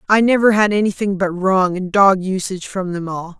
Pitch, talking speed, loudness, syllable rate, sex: 190 Hz, 210 wpm, -16 LUFS, 5.3 syllables/s, female